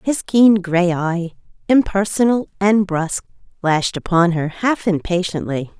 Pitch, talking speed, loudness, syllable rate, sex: 185 Hz, 125 wpm, -17 LUFS, 4.3 syllables/s, female